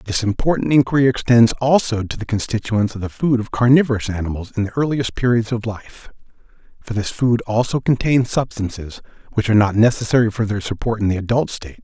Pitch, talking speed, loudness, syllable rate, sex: 115 Hz, 190 wpm, -18 LUFS, 5.9 syllables/s, male